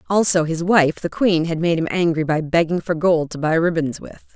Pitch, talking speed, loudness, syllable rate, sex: 165 Hz, 235 wpm, -19 LUFS, 5.3 syllables/s, female